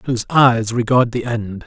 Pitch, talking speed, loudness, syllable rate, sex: 120 Hz, 180 wpm, -16 LUFS, 1.9 syllables/s, male